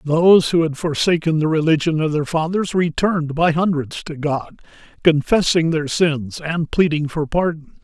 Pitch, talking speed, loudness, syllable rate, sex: 160 Hz, 160 wpm, -18 LUFS, 4.7 syllables/s, male